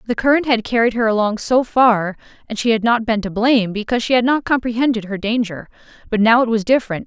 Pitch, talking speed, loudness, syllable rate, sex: 230 Hz, 230 wpm, -17 LUFS, 6.3 syllables/s, female